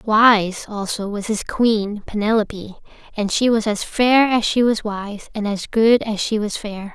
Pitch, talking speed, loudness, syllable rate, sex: 215 Hz, 190 wpm, -19 LUFS, 4.1 syllables/s, female